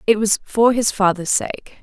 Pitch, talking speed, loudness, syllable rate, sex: 210 Hz, 195 wpm, -17 LUFS, 4.4 syllables/s, female